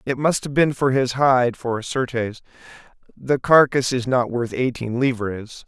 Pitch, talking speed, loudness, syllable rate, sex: 125 Hz, 170 wpm, -20 LUFS, 4.4 syllables/s, male